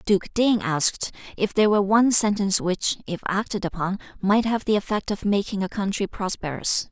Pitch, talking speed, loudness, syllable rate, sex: 200 Hz, 180 wpm, -23 LUFS, 5.6 syllables/s, female